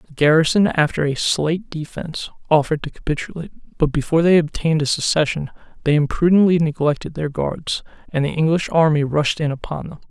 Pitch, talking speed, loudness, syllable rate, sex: 155 Hz, 165 wpm, -19 LUFS, 5.9 syllables/s, male